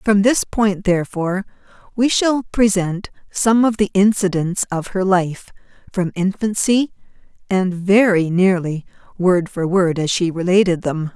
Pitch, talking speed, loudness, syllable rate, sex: 190 Hz, 140 wpm, -17 LUFS, 4.2 syllables/s, female